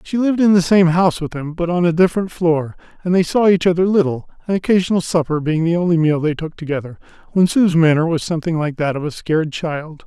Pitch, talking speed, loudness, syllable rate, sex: 170 Hz, 240 wpm, -17 LUFS, 6.2 syllables/s, male